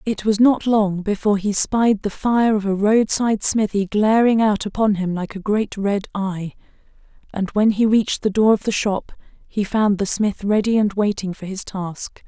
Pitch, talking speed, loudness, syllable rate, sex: 205 Hz, 200 wpm, -19 LUFS, 4.7 syllables/s, female